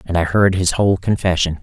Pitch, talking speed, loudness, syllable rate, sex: 90 Hz, 220 wpm, -16 LUFS, 6.0 syllables/s, male